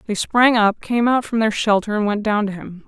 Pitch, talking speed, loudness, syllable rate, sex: 215 Hz, 270 wpm, -18 LUFS, 5.2 syllables/s, female